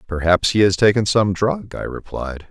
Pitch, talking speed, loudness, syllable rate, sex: 100 Hz, 190 wpm, -18 LUFS, 4.8 syllables/s, male